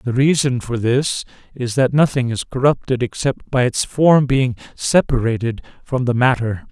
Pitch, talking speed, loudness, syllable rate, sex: 125 Hz, 160 wpm, -18 LUFS, 4.5 syllables/s, male